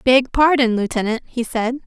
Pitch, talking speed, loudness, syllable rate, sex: 245 Hz, 160 wpm, -18 LUFS, 4.9 syllables/s, female